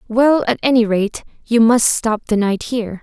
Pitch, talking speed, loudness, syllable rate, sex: 230 Hz, 200 wpm, -16 LUFS, 4.6 syllables/s, female